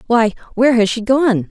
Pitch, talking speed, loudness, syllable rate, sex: 230 Hz, 200 wpm, -15 LUFS, 5.4 syllables/s, female